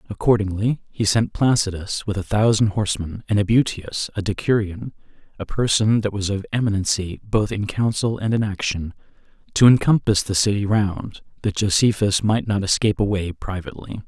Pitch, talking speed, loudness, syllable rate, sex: 105 Hz, 155 wpm, -20 LUFS, 5.3 syllables/s, male